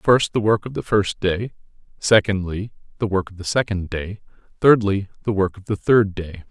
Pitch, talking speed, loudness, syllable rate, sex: 100 Hz, 195 wpm, -20 LUFS, 4.8 syllables/s, male